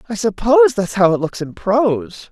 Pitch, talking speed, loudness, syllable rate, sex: 215 Hz, 205 wpm, -16 LUFS, 5.2 syllables/s, female